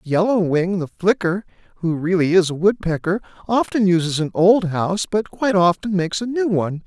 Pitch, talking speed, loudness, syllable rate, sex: 185 Hz, 185 wpm, -19 LUFS, 5.4 syllables/s, male